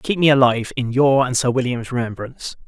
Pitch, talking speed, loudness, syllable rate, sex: 125 Hz, 200 wpm, -18 LUFS, 6.1 syllables/s, male